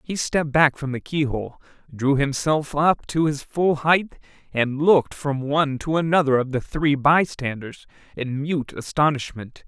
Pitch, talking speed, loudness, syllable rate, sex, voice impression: 145 Hz, 160 wpm, -21 LUFS, 4.6 syllables/s, male, masculine, adult-like, slightly muffled, slightly refreshing, slightly unique